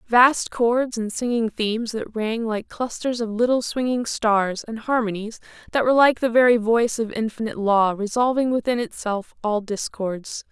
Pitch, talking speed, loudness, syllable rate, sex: 225 Hz, 165 wpm, -22 LUFS, 4.7 syllables/s, female